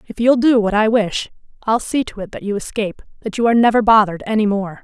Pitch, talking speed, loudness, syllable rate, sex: 215 Hz, 235 wpm, -17 LUFS, 6.5 syllables/s, female